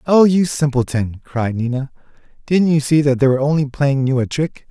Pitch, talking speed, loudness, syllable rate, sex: 140 Hz, 205 wpm, -17 LUFS, 5.3 syllables/s, male